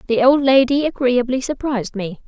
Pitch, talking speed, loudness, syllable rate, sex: 255 Hz, 160 wpm, -17 LUFS, 5.4 syllables/s, female